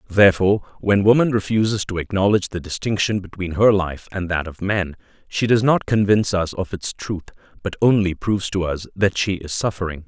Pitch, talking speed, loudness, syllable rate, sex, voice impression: 95 Hz, 190 wpm, -20 LUFS, 5.7 syllables/s, male, very masculine, adult-like, slightly middle-aged, very thick, tensed, slightly powerful, slightly bright, soft, slightly muffled, fluent, very cool, very intellectual, refreshing, sincere, very calm, very mature, very friendly, very reassuring, slightly unique, slightly elegant, very wild, sweet, kind, slightly modest